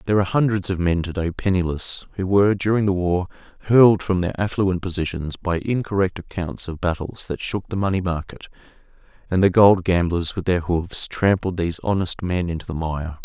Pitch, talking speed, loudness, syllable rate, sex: 90 Hz, 190 wpm, -21 LUFS, 5.5 syllables/s, male